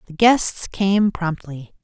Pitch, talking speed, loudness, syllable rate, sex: 185 Hz, 130 wpm, -19 LUFS, 3.2 syllables/s, female